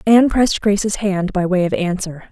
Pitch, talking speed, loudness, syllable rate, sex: 195 Hz, 205 wpm, -17 LUFS, 5.5 syllables/s, female